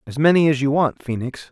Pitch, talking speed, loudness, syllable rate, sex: 140 Hz, 235 wpm, -19 LUFS, 6.1 syllables/s, male